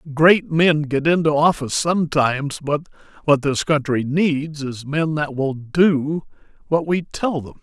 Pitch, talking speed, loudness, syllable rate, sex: 150 Hz, 175 wpm, -19 LUFS, 4.5 syllables/s, male